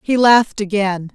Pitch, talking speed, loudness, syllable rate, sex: 210 Hz, 155 wpm, -15 LUFS, 4.8 syllables/s, female